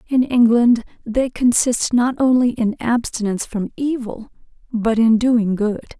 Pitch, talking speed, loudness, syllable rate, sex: 235 Hz, 140 wpm, -18 LUFS, 4.2 syllables/s, female